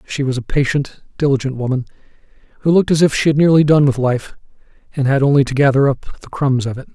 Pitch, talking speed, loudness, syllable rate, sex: 140 Hz, 225 wpm, -16 LUFS, 6.5 syllables/s, male